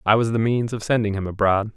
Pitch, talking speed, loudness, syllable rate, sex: 110 Hz, 275 wpm, -21 LUFS, 6.1 syllables/s, male